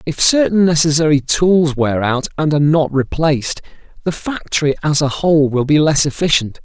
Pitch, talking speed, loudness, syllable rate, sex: 150 Hz, 170 wpm, -15 LUFS, 5.3 syllables/s, male